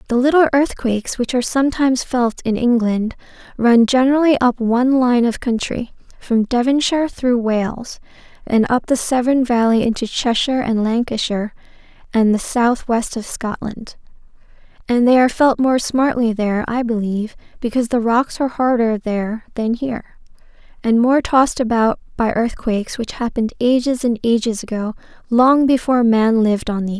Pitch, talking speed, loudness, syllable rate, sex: 240 Hz, 155 wpm, -17 LUFS, 5.4 syllables/s, female